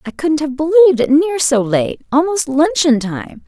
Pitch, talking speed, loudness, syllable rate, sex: 290 Hz, 175 wpm, -14 LUFS, 4.9 syllables/s, female